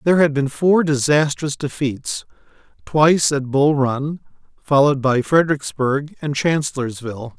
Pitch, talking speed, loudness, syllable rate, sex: 145 Hz, 115 wpm, -18 LUFS, 4.7 syllables/s, male